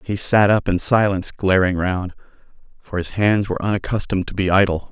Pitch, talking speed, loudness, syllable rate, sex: 95 Hz, 195 wpm, -19 LUFS, 6.1 syllables/s, male